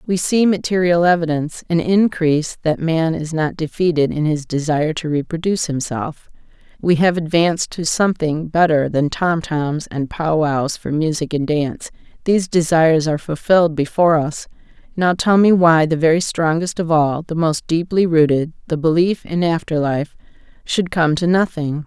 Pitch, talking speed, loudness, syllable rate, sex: 160 Hz, 165 wpm, -17 LUFS, 5.0 syllables/s, female